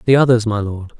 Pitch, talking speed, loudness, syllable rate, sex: 115 Hz, 240 wpm, -16 LUFS, 6.3 syllables/s, male